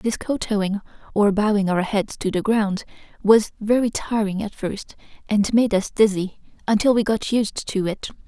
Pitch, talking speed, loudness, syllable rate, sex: 210 Hz, 175 wpm, -21 LUFS, 4.6 syllables/s, female